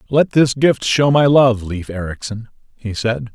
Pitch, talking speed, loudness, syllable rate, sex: 125 Hz, 180 wpm, -16 LUFS, 4.2 syllables/s, male